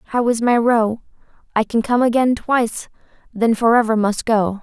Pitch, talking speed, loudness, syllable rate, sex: 230 Hz, 180 wpm, -17 LUFS, 4.7 syllables/s, female